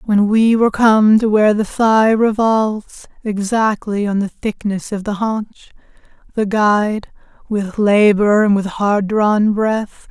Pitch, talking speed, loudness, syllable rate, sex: 210 Hz, 150 wpm, -15 LUFS, 4.0 syllables/s, female